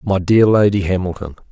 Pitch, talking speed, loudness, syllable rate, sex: 95 Hz, 160 wpm, -15 LUFS, 5.5 syllables/s, male